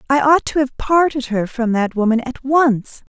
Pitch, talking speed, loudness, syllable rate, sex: 260 Hz, 190 wpm, -17 LUFS, 4.5 syllables/s, female